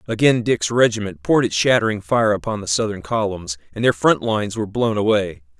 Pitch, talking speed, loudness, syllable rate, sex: 105 Hz, 195 wpm, -19 LUFS, 5.8 syllables/s, male